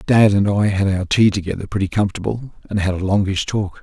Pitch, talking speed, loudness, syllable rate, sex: 100 Hz, 220 wpm, -18 LUFS, 5.9 syllables/s, male